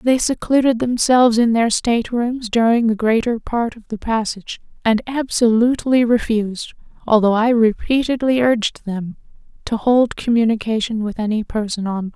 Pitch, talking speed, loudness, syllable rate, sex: 230 Hz, 145 wpm, -17 LUFS, 5.1 syllables/s, female